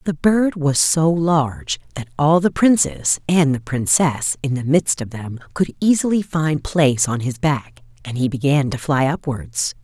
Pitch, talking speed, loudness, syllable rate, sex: 145 Hz, 185 wpm, -18 LUFS, 4.3 syllables/s, female